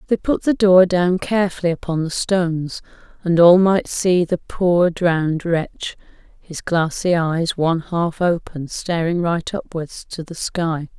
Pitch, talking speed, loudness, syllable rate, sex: 170 Hz, 155 wpm, -18 LUFS, 4.1 syllables/s, female